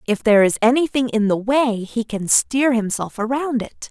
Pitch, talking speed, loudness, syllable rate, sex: 235 Hz, 200 wpm, -18 LUFS, 4.9 syllables/s, female